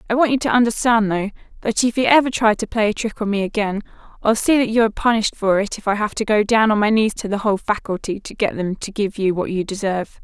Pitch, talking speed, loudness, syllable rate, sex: 215 Hz, 280 wpm, -19 LUFS, 6.5 syllables/s, female